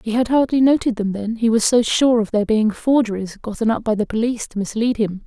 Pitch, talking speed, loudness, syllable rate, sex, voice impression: 225 Hz, 250 wpm, -18 LUFS, 5.9 syllables/s, female, feminine, adult-like, relaxed, slightly weak, slightly dark, muffled, intellectual, slightly calm, unique, sharp